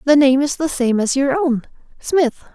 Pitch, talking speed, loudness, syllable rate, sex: 280 Hz, 190 wpm, -17 LUFS, 4.5 syllables/s, female